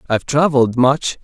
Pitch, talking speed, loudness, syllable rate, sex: 135 Hz, 145 wpm, -15 LUFS, 5.9 syllables/s, male